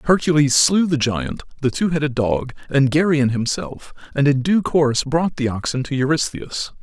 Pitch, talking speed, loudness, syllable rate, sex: 140 Hz, 175 wpm, -19 LUFS, 4.8 syllables/s, male